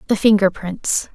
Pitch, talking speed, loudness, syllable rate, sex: 195 Hz, 155 wpm, -17 LUFS, 4.4 syllables/s, female